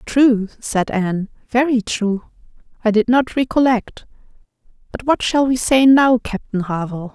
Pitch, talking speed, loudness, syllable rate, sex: 230 Hz, 145 wpm, -17 LUFS, 4.5 syllables/s, female